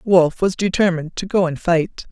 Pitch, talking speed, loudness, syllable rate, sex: 180 Hz, 200 wpm, -18 LUFS, 5.5 syllables/s, female